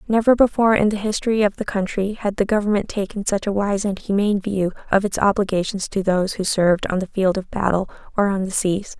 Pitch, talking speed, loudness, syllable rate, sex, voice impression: 200 Hz, 225 wpm, -20 LUFS, 6.1 syllables/s, female, very feminine, young, very thin, tensed, slightly powerful, very bright, slightly soft, very clear, very fluent, very cute, very intellectual, refreshing, sincere, very calm, very friendly, very reassuring, slightly unique, very elegant, slightly wild, very sweet, slightly lively, very kind, slightly modest